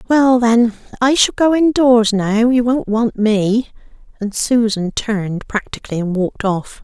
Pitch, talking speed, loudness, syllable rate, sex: 225 Hz, 150 wpm, -15 LUFS, 4.2 syllables/s, female